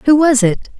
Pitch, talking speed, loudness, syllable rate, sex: 265 Hz, 225 wpm, -13 LUFS, 4.3 syllables/s, female